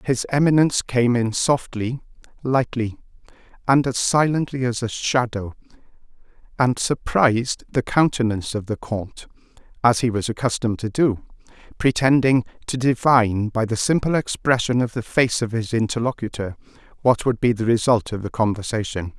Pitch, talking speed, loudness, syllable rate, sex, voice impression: 120 Hz, 145 wpm, -21 LUFS, 5.2 syllables/s, male, masculine, middle-aged, slightly bright, slightly halting, slightly sincere, slightly mature, friendly, slightly reassuring, kind